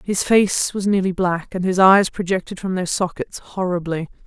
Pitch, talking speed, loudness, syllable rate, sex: 185 Hz, 185 wpm, -19 LUFS, 4.7 syllables/s, female